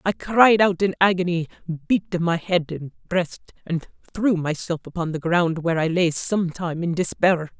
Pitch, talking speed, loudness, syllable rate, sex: 175 Hz, 180 wpm, -22 LUFS, 4.4 syllables/s, female